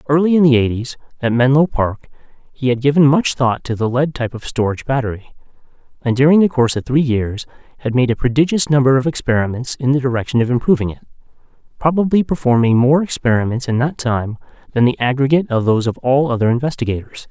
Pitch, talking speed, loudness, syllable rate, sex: 130 Hz, 190 wpm, -16 LUFS, 6.4 syllables/s, male